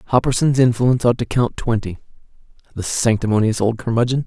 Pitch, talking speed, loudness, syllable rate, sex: 115 Hz, 140 wpm, -18 LUFS, 6.2 syllables/s, male